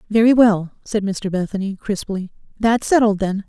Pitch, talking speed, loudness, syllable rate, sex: 205 Hz, 155 wpm, -18 LUFS, 4.8 syllables/s, female